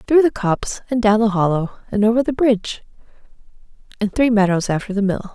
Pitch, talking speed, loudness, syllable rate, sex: 215 Hz, 190 wpm, -18 LUFS, 6.0 syllables/s, female